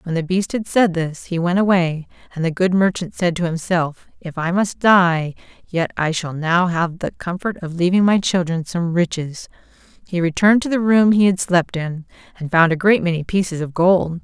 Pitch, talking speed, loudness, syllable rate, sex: 175 Hz, 210 wpm, -18 LUFS, 4.9 syllables/s, female